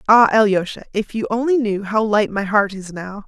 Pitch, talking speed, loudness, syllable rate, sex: 210 Hz, 220 wpm, -18 LUFS, 5.1 syllables/s, female